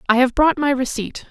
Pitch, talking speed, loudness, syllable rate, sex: 265 Hz, 230 wpm, -18 LUFS, 5.5 syllables/s, female